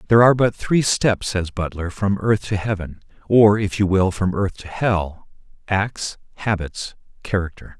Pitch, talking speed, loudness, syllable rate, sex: 100 Hz, 160 wpm, -20 LUFS, 4.5 syllables/s, male